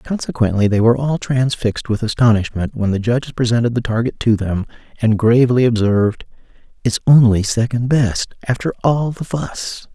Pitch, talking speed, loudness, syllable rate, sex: 115 Hz, 155 wpm, -17 LUFS, 5.4 syllables/s, male